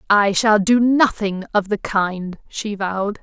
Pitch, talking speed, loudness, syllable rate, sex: 205 Hz, 165 wpm, -18 LUFS, 3.9 syllables/s, female